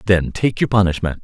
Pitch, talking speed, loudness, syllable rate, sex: 95 Hz, 195 wpm, -17 LUFS, 5.6 syllables/s, male